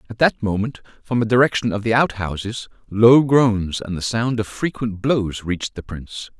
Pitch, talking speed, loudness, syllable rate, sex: 110 Hz, 190 wpm, -19 LUFS, 4.9 syllables/s, male